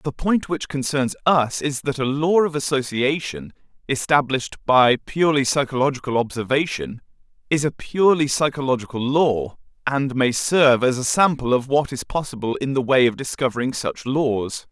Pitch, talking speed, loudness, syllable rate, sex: 135 Hz, 155 wpm, -20 LUFS, 5.0 syllables/s, male